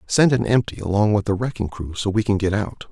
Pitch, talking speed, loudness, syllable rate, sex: 105 Hz, 265 wpm, -21 LUFS, 5.9 syllables/s, male